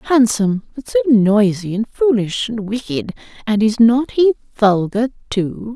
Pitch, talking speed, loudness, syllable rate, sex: 225 Hz, 145 wpm, -16 LUFS, 4.3 syllables/s, female